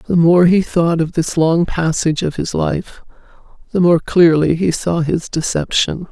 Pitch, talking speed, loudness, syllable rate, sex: 170 Hz, 175 wpm, -15 LUFS, 4.3 syllables/s, female